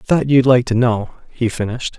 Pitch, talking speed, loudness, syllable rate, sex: 120 Hz, 210 wpm, -16 LUFS, 5.0 syllables/s, male